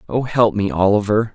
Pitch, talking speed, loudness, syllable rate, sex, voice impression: 105 Hz, 180 wpm, -17 LUFS, 5.1 syllables/s, male, masculine, adult-like, slightly middle-aged, thick, tensed, slightly powerful, bright, very hard, clear, slightly fluent, cool, very intellectual, slightly sincere, very calm, mature, slightly friendly, very reassuring, slightly unique, elegant, slightly wild, sweet, slightly lively, slightly strict